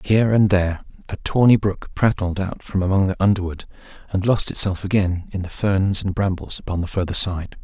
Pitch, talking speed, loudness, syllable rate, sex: 95 Hz, 195 wpm, -20 LUFS, 5.5 syllables/s, male